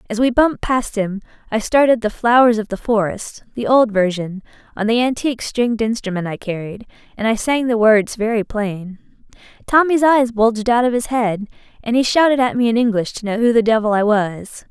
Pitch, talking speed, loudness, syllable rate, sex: 225 Hz, 195 wpm, -17 LUFS, 5.4 syllables/s, female